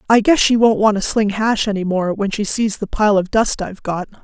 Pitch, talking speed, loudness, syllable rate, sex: 210 Hz, 270 wpm, -17 LUFS, 5.3 syllables/s, female